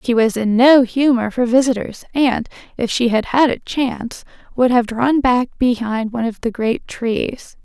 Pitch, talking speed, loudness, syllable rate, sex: 240 Hz, 190 wpm, -17 LUFS, 4.4 syllables/s, female